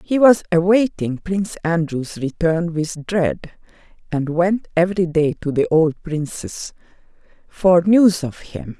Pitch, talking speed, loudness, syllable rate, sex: 170 Hz, 135 wpm, -18 LUFS, 4.0 syllables/s, female